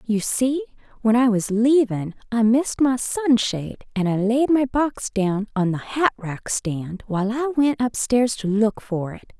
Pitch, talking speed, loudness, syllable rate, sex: 230 Hz, 185 wpm, -21 LUFS, 4.1 syllables/s, female